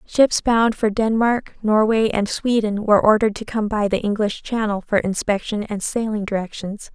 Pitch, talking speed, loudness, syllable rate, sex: 215 Hz, 175 wpm, -20 LUFS, 4.9 syllables/s, female